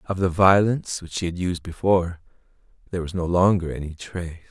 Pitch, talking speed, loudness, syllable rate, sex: 90 Hz, 185 wpm, -23 LUFS, 6.2 syllables/s, male